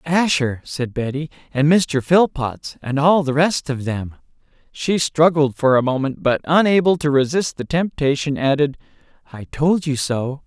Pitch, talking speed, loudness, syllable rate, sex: 145 Hz, 160 wpm, -18 LUFS, 4.4 syllables/s, male